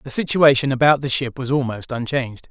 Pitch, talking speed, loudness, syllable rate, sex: 130 Hz, 190 wpm, -19 LUFS, 5.8 syllables/s, male